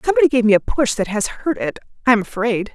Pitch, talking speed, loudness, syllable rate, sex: 235 Hz, 260 wpm, -18 LUFS, 6.8 syllables/s, female